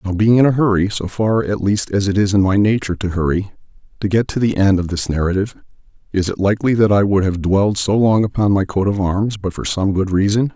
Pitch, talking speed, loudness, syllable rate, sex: 100 Hz, 245 wpm, -17 LUFS, 6.0 syllables/s, male